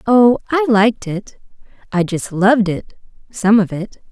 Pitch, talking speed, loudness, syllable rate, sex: 215 Hz, 130 wpm, -16 LUFS, 4.4 syllables/s, female